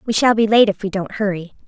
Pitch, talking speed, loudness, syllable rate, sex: 205 Hz, 285 wpm, -17 LUFS, 6.3 syllables/s, female